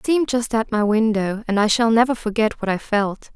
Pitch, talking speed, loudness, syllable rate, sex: 220 Hz, 250 wpm, -19 LUFS, 5.5 syllables/s, female